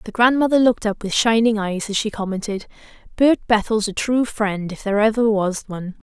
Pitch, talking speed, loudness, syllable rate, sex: 215 Hz, 195 wpm, -19 LUFS, 5.7 syllables/s, female